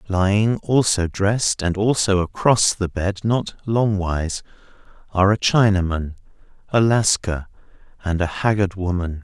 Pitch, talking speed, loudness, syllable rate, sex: 100 Hz, 125 wpm, -20 LUFS, 4.5 syllables/s, male